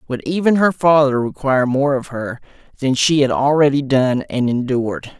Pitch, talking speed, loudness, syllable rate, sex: 135 Hz, 175 wpm, -17 LUFS, 5.0 syllables/s, male